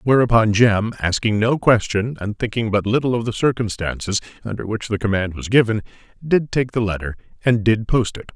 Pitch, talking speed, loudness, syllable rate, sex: 110 Hz, 185 wpm, -19 LUFS, 5.4 syllables/s, male